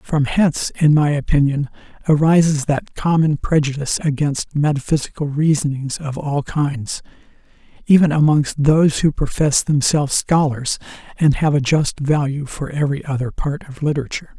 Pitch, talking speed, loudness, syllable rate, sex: 145 Hz, 140 wpm, -18 LUFS, 5.1 syllables/s, male